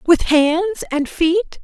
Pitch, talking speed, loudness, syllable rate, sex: 340 Hz, 145 wpm, -17 LUFS, 3.3 syllables/s, female